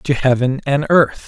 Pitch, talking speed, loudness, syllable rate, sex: 140 Hz, 190 wpm, -15 LUFS, 4.4 syllables/s, male